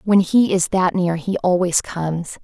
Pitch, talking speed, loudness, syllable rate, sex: 180 Hz, 200 wpm, -18 LUFS, 4.5 syllables/s, female